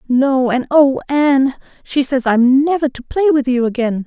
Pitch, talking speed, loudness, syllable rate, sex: 265 Hz, 190 wpm, -15 LUFS, 4.6 syllables/s, female